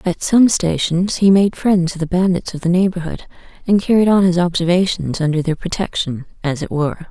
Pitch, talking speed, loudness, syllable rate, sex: 175 Hz, 195 wpm, -16 LUFS, 5.5 syllables/s, female